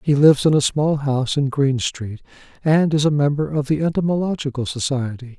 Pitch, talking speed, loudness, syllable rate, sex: 145 Hz, 190 wpm, -19 LUFS, 5.5 syllables/s, male